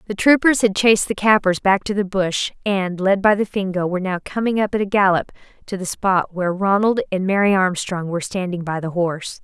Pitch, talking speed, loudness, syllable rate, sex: 195 Hz, 225 wpm, -19 LUFS, 5.7 syllables/s, female